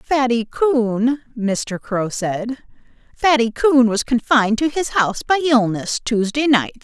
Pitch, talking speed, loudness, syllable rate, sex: 240 Hz, 130 wpm, -18 LUFS, 4.0 syllables/s, female